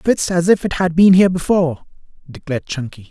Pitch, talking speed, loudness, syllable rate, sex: 170 Hz, 195 wpm, -16 LUFS, 6.2 syllables/s, male